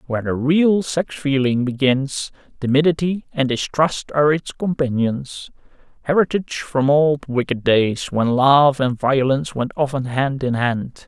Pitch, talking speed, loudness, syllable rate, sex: 140 Hz, 140 wpm, -19 LUFS, 4.3 syllables/s, male